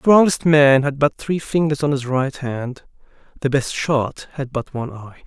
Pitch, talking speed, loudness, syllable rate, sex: 140 Hz, 205 wpm, -19 LUFS, 4.6 syllables/s, male